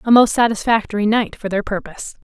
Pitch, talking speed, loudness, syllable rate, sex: 215 Hz, 185 wpm, -17 LUFS, 6.1 syllables/s, female